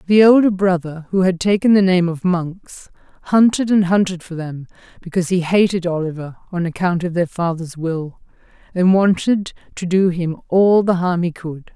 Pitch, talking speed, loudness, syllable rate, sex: 180 Hz, 180 wpm, -17 LUFS, 4.9 syllables/s, female